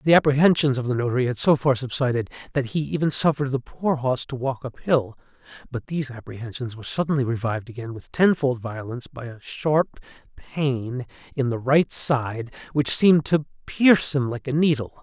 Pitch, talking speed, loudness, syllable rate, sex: 135 Hz, 185 wpm, -23 LUFS, 5.7 syllables/s, male